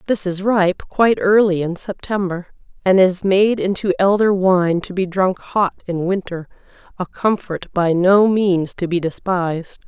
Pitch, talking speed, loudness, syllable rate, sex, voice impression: 185 Hz, 165 wpm, -17 LUFS, 4.3 syllables/s, female, feminine, adult-like, tensed, slightly soft, slightly muffled, intellectual, calm, slightly friendly, reassuring, elegant, slightly lively, slightly kind